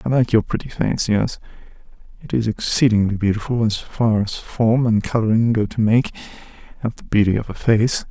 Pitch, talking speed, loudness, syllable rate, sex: 110 Hz, 185 wpm, -19 LUFS, 5.3 syllables/s, male